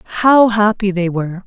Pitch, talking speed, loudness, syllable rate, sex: 200 Hz, 165 wpm, -14 LUFS, 6.0 syllables/s, female